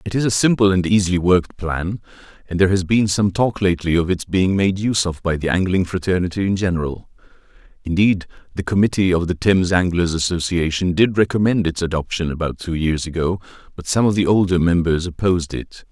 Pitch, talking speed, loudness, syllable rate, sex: 90 Hz, 190 wpm, -18 LUFS, 6.0 syllables/s, male